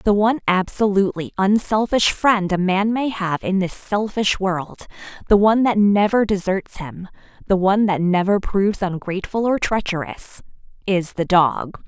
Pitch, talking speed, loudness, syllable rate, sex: 195 Hz, 150 wpm, -19 LUFS, 4.7 syllables/s, female